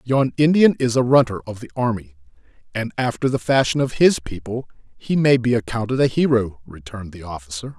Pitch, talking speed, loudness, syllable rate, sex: 115 Hz, 185 wpm, -19 LUFS, 5.6 syllables/s, male